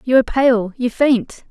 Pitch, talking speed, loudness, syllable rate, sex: 245 Hz, 200 wpm, -16 LUFS, 4.4 syllables/s, female